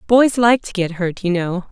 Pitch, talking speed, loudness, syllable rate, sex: 200 Hz, 245 wpm, -17 LUFS, 4.6 syllables/s, female